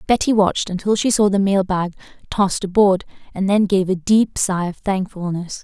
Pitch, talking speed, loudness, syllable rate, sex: 195 Hz, 190 wpm, -18 LUFS, 5.1 syllables/s, female